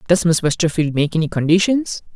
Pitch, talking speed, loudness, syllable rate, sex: 170 Hz, 165 wpm, -17 LUFS, 5.8 syllables/s, male